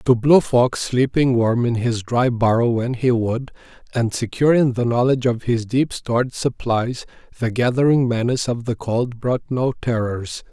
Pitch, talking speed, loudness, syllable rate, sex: 120 Hz, 175 wpm, -19 LUFS, 4.7 syllables/s, male